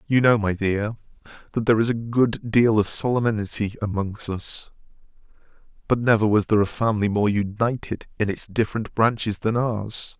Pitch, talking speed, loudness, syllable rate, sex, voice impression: 110 Hz, 165 wpm, -22 LUFS, 5.3 syllables/s, male, very masculine, very adult-like, very middle-aged, very thick, tensed, very powerful, slightly bright, hard, very clear, fluent, very cool, very intellectual, slightly refreshing, sincere, very calm, very mature, very friendly, very reassuring, slightly unique, wild, slightly sweet, lively, very kind, slightly modest